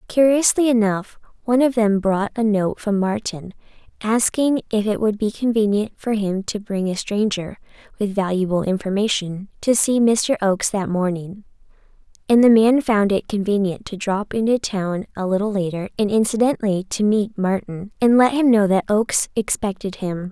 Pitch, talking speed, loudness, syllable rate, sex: 210 Hz, 170 wpm, -19 LUFS, 4.9 syllables/s, female